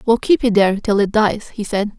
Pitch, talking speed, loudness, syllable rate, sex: 215 Hz, 275 wpm, -16 LUFS, 5.6 syllables/s, female